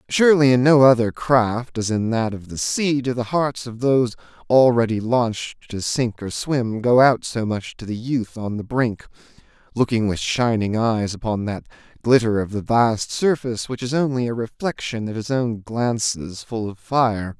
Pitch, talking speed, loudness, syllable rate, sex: 120 Hz, 190 wpm, -20 LUFS, 4.6 syllables/s, male